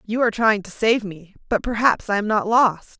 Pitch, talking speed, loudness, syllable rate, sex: 215 Hz, 240 wpm, -20 LUFS, 5.1 syllables/s, female